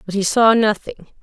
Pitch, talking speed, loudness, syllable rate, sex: 210 Hz, 195 wpm, -15 LUFS, 4.9 syllables/s, female